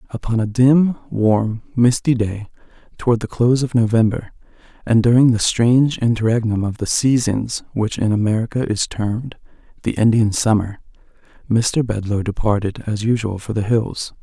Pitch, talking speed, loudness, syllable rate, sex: 115 Hz, 150 wpm, -18 LUFS, 5.0 syllables/s, male